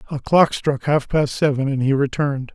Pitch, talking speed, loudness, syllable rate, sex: 140 Hz, 210 wpm, -19 LUFS, 5.2 syllables/s, male